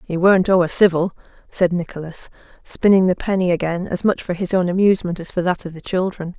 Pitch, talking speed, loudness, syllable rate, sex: 180 Hz, 205 wpm, -18 LUFS, 6.0 syllables/s, female